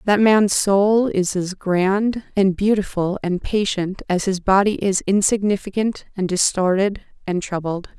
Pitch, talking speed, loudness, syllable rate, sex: 195 Hz, 145 wpm, -19 LUFS, 4.2 syllables/s, female